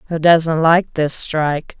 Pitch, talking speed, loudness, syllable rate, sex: 160 Hz, 165 wpm, -15 LUFS, 3.8 syllables/s, female